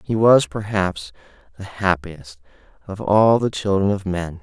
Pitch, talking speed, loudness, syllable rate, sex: 95 Hz, 150 wpm, -19 LUFS, 4.1 syllables/s, male